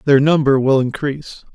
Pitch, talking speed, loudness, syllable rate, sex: 140 Hz, 155 wpm, -15 LUFS, 5.2 syllables/s, male